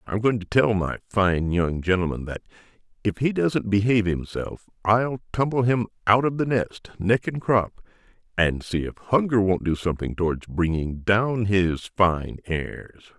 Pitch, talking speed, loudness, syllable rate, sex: 100 Hz, 170 wpm, -23 LUFS, 4.4 syllables/s, male